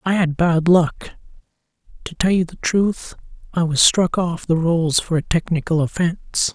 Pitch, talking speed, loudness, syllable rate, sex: 170 Hz, 165 wpm, -18 LUFS, 4.4 syllables/s, male